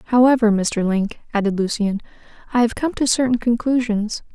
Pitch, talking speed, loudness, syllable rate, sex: 230 Hz, 150 wpm, -19 LUFS, 5.0 syllables/s, female